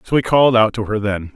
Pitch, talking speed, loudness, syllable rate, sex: 110 Hz, 310 wpm, -16 LUFS, 6.5 syllables/s, male